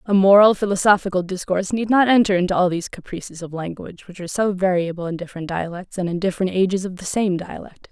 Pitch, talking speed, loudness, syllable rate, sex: 185 Hz, 210 wpm, -20 LUFS, 6.7 syllables/s, female